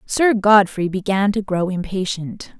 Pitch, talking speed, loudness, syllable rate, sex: 195 Hz, 140 wpm, -18 LUFS, 4.1 syllables/s, female